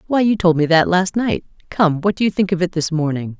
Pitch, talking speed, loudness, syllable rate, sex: 175 Hz, 265 wpm, -17 LUFS, 5.7 syllables/s, female